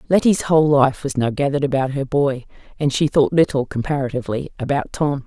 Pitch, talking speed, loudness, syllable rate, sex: 140 Hz, 180 wpm, -19 LUFS, 6.0 syllables/s, female